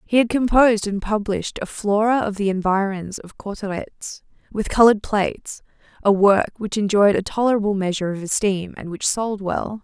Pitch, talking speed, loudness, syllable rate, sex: 205 Hz, 170 wpm, -20 LUFS, 5.3 syllables/s, female